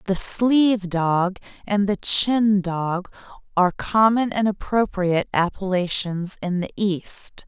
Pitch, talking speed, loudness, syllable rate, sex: 195 Hz, 120 wpm, -21 LUFS, 3.7 syllables/s, female